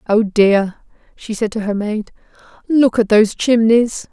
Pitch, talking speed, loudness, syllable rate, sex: 220 Hz, 160 wpm, -15 LUFS, 4.3 syllables/s, female